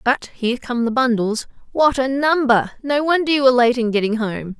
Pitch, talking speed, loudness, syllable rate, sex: 250 Hz, 210 wpm, -18 LUFS, 5.3 syllables/s, female